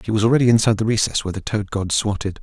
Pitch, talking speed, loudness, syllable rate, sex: 110 Hz, 270 wpm, -19 LUFS, 7.7 syllables/s, male